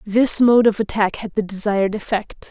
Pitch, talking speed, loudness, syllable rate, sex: 210 Hz, 190 wpm, -18 LUFS, 5.0 syllables/s, female